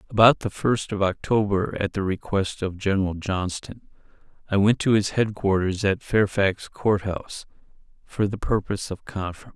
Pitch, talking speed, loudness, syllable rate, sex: 100 Hz, 155 wpm, -24 LUFS, 5.1 syllables/s, male